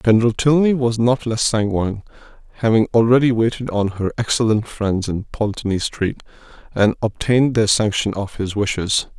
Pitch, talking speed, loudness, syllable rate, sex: 110 Hz, 150 wpm, -18 LUFS, 5.1 syllables/s, male